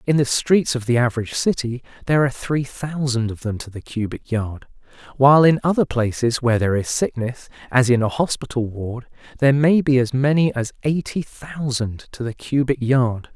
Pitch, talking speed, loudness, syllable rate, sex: 130 Hz, 190 wpm, -20 LUFS, 5.3 syllables/s, male